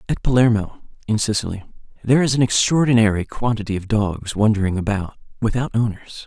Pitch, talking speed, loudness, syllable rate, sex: 110 Hz, 145 wpm, -19 LUFS, 5.9 syllables/s, male